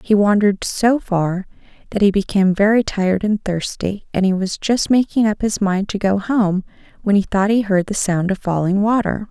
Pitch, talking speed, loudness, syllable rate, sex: 200 Hz, 205 wpm, -18 LUFS, 5.1 syllables/s, female